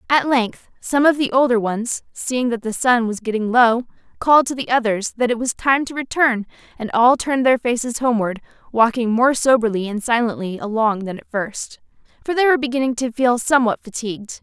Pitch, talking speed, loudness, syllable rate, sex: 240 Hz, 195 wpm, -18 LUFS, 5.5 syllables/s, female